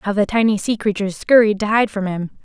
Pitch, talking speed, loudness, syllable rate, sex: 205 Hz, 245 wpm, -17 LUFS, 6.1 syllables/s, female